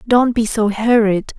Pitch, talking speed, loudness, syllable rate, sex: 225 Hz, 175 wpm, -15 LUFS, 4.4 syllables/s, female